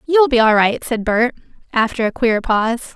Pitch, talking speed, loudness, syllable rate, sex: 240 Hz, 205 wpm, -16 LUFS, 4.9 syllables/s, female